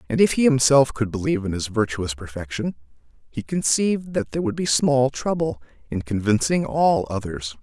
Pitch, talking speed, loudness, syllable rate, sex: 120 Hz, 175 wpm, -22 LUFS, 5.3 syllables/s, male